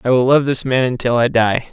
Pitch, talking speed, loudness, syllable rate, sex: 125 Hz, 280 wpm, -15 LUFS, 5.6 syllables/s, male